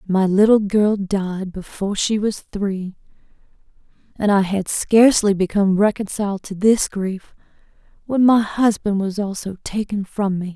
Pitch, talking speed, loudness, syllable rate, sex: 200 Hz, 140 wpm, -19 LUFS, 4.5 syllables/s, female